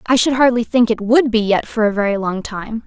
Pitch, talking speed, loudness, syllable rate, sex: 225 Hz, 270 wpm, -16 LUFS, 5.5 syllables/s, female